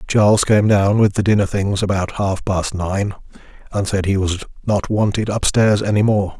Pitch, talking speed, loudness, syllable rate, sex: 100 Hz, 190 wpm, -17 LUFS, 4.8 syllables/s, male